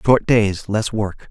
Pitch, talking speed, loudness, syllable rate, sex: 105 Hz, 185 wpm, -18 LUFS, 3.5 syllables/s, male